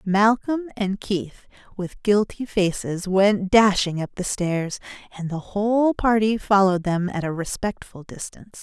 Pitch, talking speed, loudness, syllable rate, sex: 195 Hz, 145 wpm, -22 LUFS, 4.3 syllables/s, female